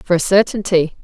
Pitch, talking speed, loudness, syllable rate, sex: 185 Hz, 175 wpm, -15 LUFS, 5.6 syllables/s, female